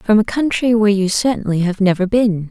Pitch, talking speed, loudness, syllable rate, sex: 205 Hz, 215 wpm, -16 LUFS, 5.7 syllables/s, female